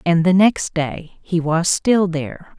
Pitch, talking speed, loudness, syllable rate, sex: 175 Hz, 185 wpm, -18 LUFS, 3.9 syllables/s, female